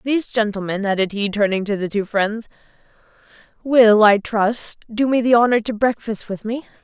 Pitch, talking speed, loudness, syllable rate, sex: 220 Hz, 175 wpm, -18 LUFS, 5.1 syllables/s, female